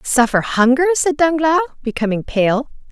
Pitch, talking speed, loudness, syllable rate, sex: 270 Hz, 125 wpm, -16 LUFS, 4.8 syllables/s, female